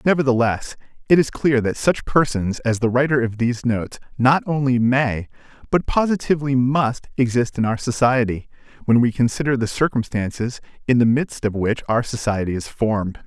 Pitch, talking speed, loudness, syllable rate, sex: 125 Hz, 165 wpm, -20 LUFS, 5.2 syllables/s, male